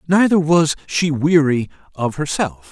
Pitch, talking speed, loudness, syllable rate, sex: 150 Hz, 135 wpm, -17 LUFS, 4.1 syllables/s, male